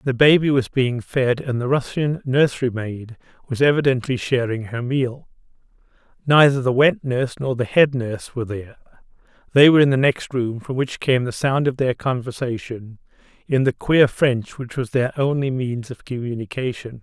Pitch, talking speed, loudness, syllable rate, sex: 130 Hz, 175 wpm, -20 LUFS, 5.0 syllables/s, male